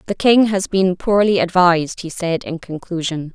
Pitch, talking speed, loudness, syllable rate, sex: 180 Hz, 180 wpm, -17 LUFS, 4.7 syllables/s, female